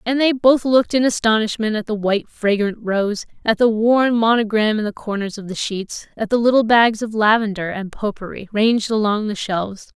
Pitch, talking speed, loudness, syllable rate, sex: 220 Hz, 205 wpm, -18 LUFS, 5.3 syllables/s, female